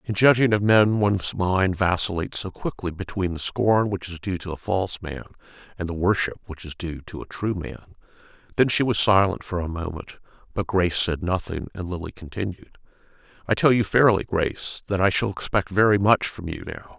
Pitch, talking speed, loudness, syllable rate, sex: 95 Hz, 200 wpm, -23 LUFS, 5.6 syllables/s, male